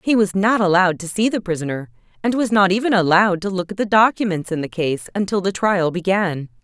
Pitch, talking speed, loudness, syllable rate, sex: 190 Hz, 215 wpm, -18 LUFS, 5.9 syllables/s, female